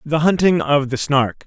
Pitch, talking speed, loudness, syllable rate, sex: 145 Hz, 205 wpm, -17 LUFS, 4.4 syllables/s, male